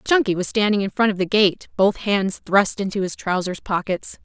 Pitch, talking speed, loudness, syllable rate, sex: 200 Hz, 210 wpm, -20 LUFS, 5.0 syllables/s, female